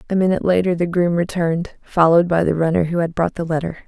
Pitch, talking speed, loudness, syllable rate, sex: 170 Hz, 230 wpm, -18 LUFS, 6.7 syllables/s, female